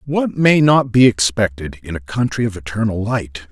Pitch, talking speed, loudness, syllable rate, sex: 110 Hz, 190 wpm, -16 LUFS, 4.8 syllables/s, male